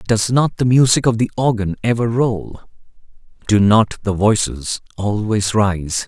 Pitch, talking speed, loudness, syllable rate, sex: 110 Hz, 150 wpm, -17 LUFS, 4.2 syllables/s, male